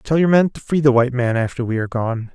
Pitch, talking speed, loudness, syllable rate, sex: 130 Hz, 305 wpm, -18 LUFS, 6.5 syllables/s, male